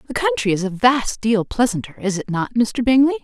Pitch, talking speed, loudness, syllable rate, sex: 235 Hz, 220 wpm, -19 LUFS, 5.3 syllables/s, female